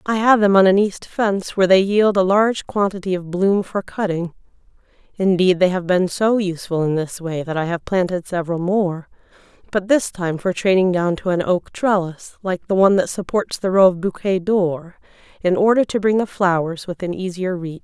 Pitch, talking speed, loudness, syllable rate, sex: 185 Hz, 205 wpm, -18 LUFS, 5.2 syllables/s, female